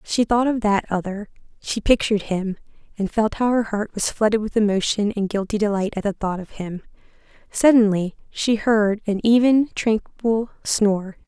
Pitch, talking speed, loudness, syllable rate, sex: 210 Hz, 170 wpm, -21 LUFS, 4.9 syllables/s, female